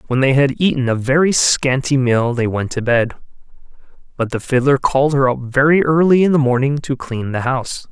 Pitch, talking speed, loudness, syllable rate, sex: 135 Hz, 205 wpm, -16 LUFS, 5.4 syllables/s, male